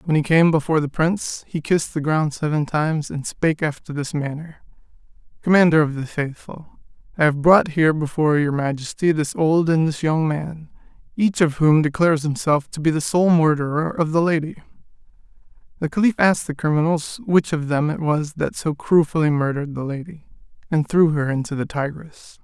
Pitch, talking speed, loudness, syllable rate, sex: 155 Hz, 185 wpm, -20 LUFS, 5.4 syllables/s, male